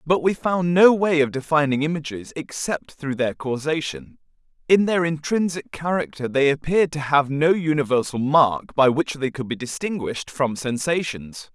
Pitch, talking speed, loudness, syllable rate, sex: 150 Hz, 160 wpm, -21 LUFS, 4.8 syllables/s, male